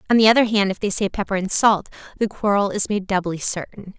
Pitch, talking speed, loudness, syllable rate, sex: 200 Hz, 240 wpm, -20 LUFS, 6.1 syllables/s, female